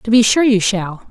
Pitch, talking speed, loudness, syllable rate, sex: 215 Hz, 270 wpm, -14 LUFS, 4.8 syllables/s, female